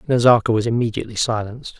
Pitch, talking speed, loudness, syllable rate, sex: 115 Hz, 135 wpm, -18 LUFS, 7.5 syllables/s, male